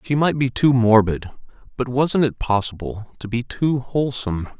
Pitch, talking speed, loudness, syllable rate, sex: 120 Hz, 170 wpm, -20 LUFS, 4.9 syllables/s, male